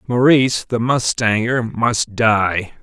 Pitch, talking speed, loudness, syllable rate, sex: 115 Hz, 105 wpm, -16 LUFS, 7.0 syllables/s, male